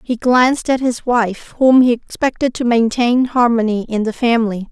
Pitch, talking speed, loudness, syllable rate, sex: 240 Hz, 180 wpm, -15 LUFS, 4.8 syllables/s, female